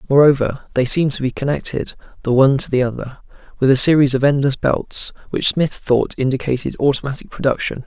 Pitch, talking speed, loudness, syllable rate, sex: 135 Hz, 175 wpm, -17 LUFS, 6.0 syllables/s, male